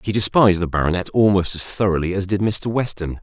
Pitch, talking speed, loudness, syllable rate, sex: 95 Hz, 205 wpm, -19 LUFS, 6.1 syllables/s, male